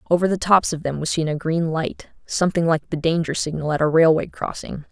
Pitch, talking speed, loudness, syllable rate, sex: 165 Hz, 230 wpm, -21 LUFS, 5.8 syllables/s, female